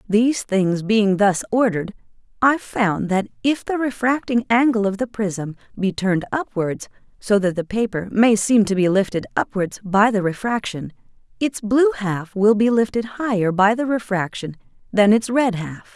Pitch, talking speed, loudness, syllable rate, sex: 210 Hz, 170 wpm, -19 LUFS, 4.6 syllables/s, female